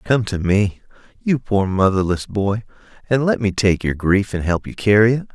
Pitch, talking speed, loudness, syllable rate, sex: 105 Hz, 200 wpm, -18 LUFS, 4.8 syllables/s, male